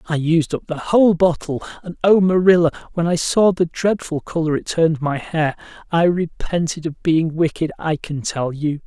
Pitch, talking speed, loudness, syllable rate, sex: 165 Hz, 190 wpm, -19 LUFS, 4.9 syllables/s, male